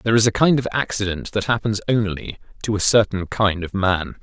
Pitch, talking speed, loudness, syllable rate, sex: 105 Hz, 215 wpm, -20 LUFS, 5.5 syllables/s, male